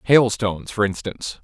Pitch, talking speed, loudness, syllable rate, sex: 110 Hz, 125 wpm, -21 LUFS, 5.3 syllables/s, male